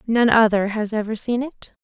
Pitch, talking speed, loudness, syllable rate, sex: 220 Hz, 195 wpm, -19 LUFS, 4.9 syllables/s, female